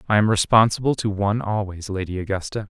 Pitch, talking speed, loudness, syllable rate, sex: 105 Hz, 175 wpm, -21 LUFS, 6.3 syllables/s, male